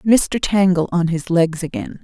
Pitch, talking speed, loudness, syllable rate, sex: 175 Hz, 175 wpm, -18 LUFS, 4.0 syllables/s, female